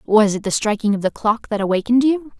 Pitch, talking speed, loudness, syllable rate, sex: 220 Hz, 250 wpm, -18 LUFS, 6.1 syllables/s, female